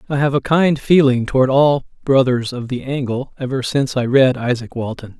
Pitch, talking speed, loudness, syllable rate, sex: 130 Hz, 195 wpm, -17 LUFS, 5.3 syllables/s, male